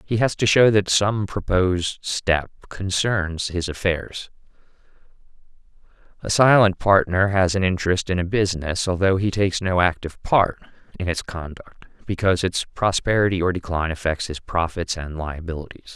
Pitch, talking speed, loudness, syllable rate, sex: 90 Hz, 145 wpm, -21 LUFS, 4.9 syllables/s, male